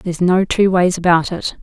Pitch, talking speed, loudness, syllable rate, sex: 180 Hz, 220 wpm, -15 LUFS, 5.1 syllables/s, female